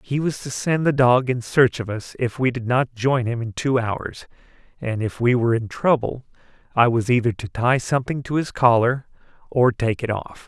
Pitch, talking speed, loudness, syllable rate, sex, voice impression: 125 Hz, 220 wpm, -21 LUFS, 5.0 syllables/s, male, masculine, slightly middle-aged, tensed, powerful, clear, fluent, slightly mature, friendly, unique, slightly wild, slightly strict